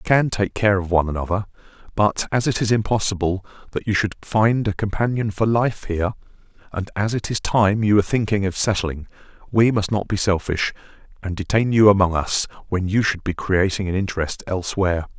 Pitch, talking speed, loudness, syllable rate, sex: 100 Hz, 195 wpm, -21 LUFS, 5.7 syllables/s, male